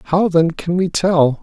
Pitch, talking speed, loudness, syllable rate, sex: 170 Hz, 210 wpm, -16 LUFS, 3.6 syllables/s, male